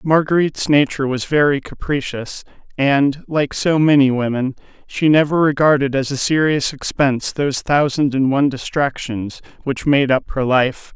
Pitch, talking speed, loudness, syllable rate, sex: 140 Hz, 150 wpm, -17 LUFS, 4.8 syllables/s, male